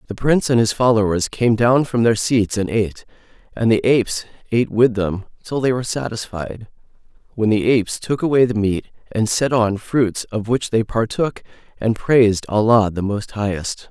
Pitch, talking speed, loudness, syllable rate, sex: 110 Hz, 185 wpm, -18 LUFS, 4.9 syllables/s, male